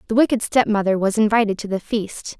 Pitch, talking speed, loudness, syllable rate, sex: 215 Hz, 200 wpm, -19 LUFS, 6.0 syllables/s, female